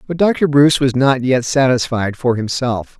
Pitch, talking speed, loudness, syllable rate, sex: 130 Hz, 180 wpm, -15 LUFS, 4.6 syllables/s, male